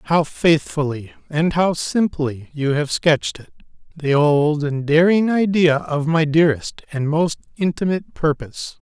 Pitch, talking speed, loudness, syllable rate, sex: 155 Hz, 140 wpm, -19 LUFS, 4.4 syllables/s, male